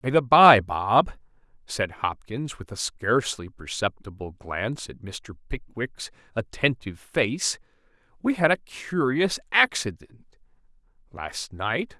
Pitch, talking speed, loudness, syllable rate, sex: 120 Hz, 115 wpm, -24 LUFS, 3.8 syllables/s, male